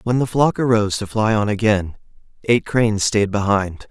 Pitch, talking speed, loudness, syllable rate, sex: 110 Hz, 185 wpm, -18 LUFS, 5.1 syllables/s, male